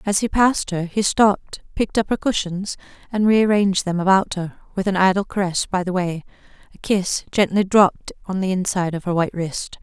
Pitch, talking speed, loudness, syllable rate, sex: 190 Hz, 210 wpm, -20 LUFS, 5.9 syllables/s, female